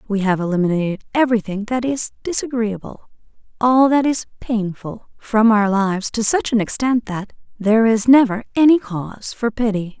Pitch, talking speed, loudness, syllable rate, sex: 220 Hz, 155 wpm, -18 LUFS, 5.2 syllables/s, female